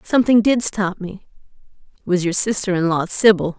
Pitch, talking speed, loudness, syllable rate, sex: 195 Hz, 185 wpm, -17 LUFS, 5.5 syllables/s, female